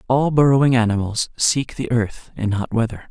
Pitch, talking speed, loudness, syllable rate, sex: 120 Hz, 175 wpm, -19 LUFS, 5.0 syllables/s, male